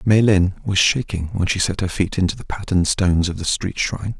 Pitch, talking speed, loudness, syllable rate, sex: 95 Hz, 230 wpm, -19 LUFS, 5.8 syllables/s, male